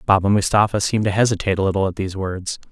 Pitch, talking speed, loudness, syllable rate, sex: 100 Hz, 220 wpm, -19 LUFS, 7.6 syllables/s, male